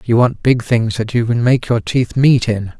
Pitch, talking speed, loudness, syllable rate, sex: 120 Hz, 260 wpm, -15 LUFS, 4.5 syllables/s, male